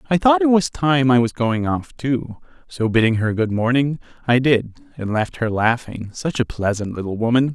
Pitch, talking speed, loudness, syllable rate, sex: 120 Hz, 200 wpm, -19 LUFS, 4.8 syllables/s, male